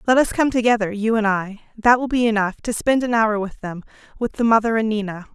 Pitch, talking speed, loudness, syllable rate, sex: 220 Hz, 245 wpm, -19 LUFS, 5.8 syllables/s, female